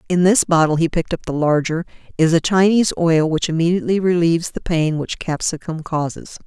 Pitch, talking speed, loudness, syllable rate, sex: 165 Hz, 185 wpm, -18 LUFS, 5.8 syllables/s, female